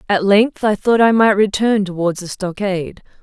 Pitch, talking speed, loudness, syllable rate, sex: 200 Hz, 185 wpm, -16 LUFS, 4.9 syllables/s, female